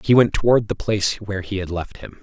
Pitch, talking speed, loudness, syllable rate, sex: 105 Hz, 270 wpm, -20 LUFS, 6.1 syllables/s, male